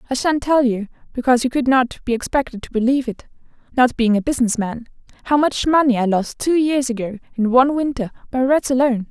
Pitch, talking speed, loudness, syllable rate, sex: 250 Hz, 210 wpm, -18 LUFS, 6.2 syllables/s, female